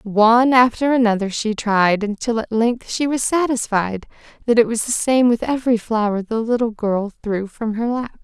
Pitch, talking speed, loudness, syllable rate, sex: 225 Hz, 190 wpm, -18 LUFS, 4.8 syllables/s, female